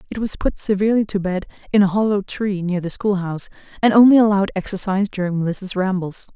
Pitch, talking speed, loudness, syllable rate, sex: 195 Hz, 190 wpm, -19 LUFS, 6.2 syllables/s, female